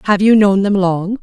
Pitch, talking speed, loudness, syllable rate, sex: 200 Hz, 245 wpm, -13 LUFS, 4.7 syllables/s, female